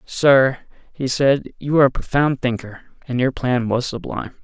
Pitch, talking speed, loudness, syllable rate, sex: 130 Hz, 175 wpm, -19 LUFS, 4.8 syllables/s, male